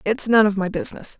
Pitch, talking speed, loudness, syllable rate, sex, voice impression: 210 Hz, 250 wpm, -19 LUFS, 6.4 syllables/s, female, very feminine, adult-like, slightly fluent, intellectual